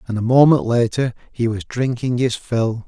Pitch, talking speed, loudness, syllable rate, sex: 120 Hz, 190 wpm, -18 LUFS, 4.7 syllables/s, male